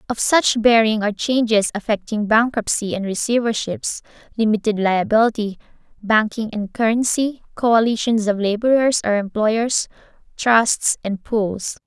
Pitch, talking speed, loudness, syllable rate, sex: 220 Hz, 110 wpm, -19 LUFS, 4.6 syllables/s, female